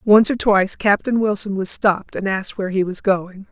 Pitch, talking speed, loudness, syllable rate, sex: 200 Hz, 220 wpm, -18 LUFS, 5.6 syllables/s, female